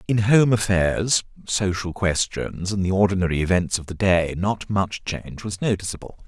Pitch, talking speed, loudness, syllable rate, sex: 95 Hz, 160 wpm, -22 LUFS, 4.8 syllables/s, male